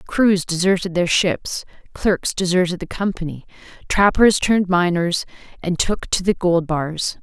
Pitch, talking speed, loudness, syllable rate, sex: 180 Hz, 140 wpm, -19 LUFS, 4.4 syllables/s, female